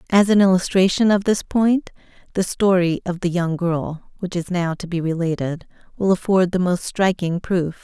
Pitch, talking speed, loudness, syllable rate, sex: 180 Hz, 185 wpm, -20 LUFS, 4.7 syllables/s, female